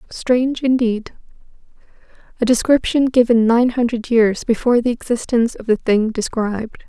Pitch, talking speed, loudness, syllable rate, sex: 235 Hz, 130 wpm, -17 LUFS, 5.1 syllables/s, female